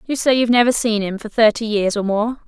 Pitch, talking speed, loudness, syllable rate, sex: 225 Hz, 265 wpm, -17 LUFS, 5.9 syllables/s, female